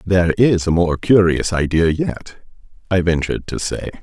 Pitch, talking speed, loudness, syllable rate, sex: 90 Hz, 165 wpm, -17 LUFS, 4.9 syllables/s, male